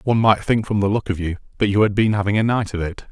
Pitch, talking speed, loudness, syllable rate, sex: 105 Hz, 325 wpm, -19 LUFS, 6.8 syllables/s, male